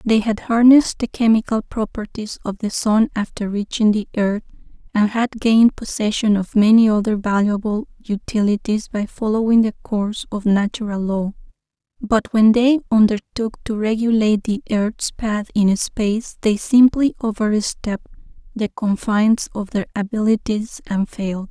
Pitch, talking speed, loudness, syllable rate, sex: 215 Hz, 140 wpm, -18 LUFS, 4.7 syllables/s, female